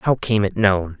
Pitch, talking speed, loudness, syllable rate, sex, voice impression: 100 Hz, 240 wpm, -19 LUFS, 4.2 syllables/s, male, very masculine, slightly adult-like, thick, tensed, slightly weak, bright, soft, clear, fluent, cool, very intellectual, refreshing, very sincere, very calm, slightly mature, friendly, very reassuring, unique, very elegant, slightly wild, sweet, lively, very kind, modest